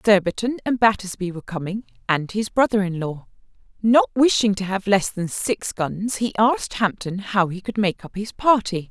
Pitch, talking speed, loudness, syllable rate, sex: 205 Hz, 190 wpm, -21 LUFS, 4.9 syllables/s, female